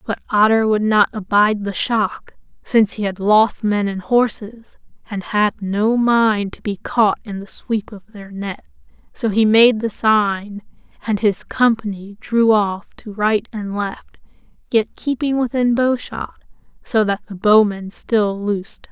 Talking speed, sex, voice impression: 170 wpm, female, gender-neutral, slightly young, tensed, slightly bright, soft, friendly, reassuring, lively